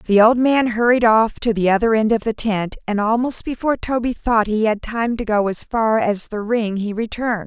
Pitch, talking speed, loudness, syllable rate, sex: 220 Hz, 235 wpm, -18 LUFS, 5.0 syllables/s, female